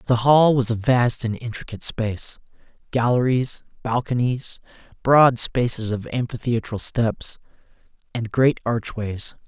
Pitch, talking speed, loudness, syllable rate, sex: 120 Hz, 110 wpm, -21 LUFS, 4.2 syllables/s, male